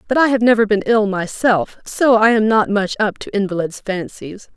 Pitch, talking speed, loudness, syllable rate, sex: 215 Hz, 210 wpm, -16 LUFS, 5.0 syllables/s, female